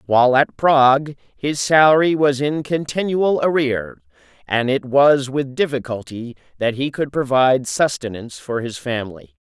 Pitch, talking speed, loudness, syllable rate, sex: 135 Hz, 140 wpm, -18 LUFS, 4.6 syllables/s, male